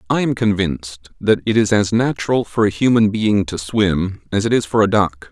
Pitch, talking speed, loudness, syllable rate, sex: 105 Hz, 225 wpm, -17 LUFS, 5.2 syllables/s, male